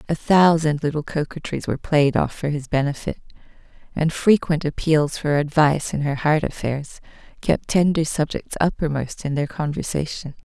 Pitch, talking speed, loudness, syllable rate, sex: 150 Hz, 150 wpm, -21 LUFS, 5.0 syllables/s, female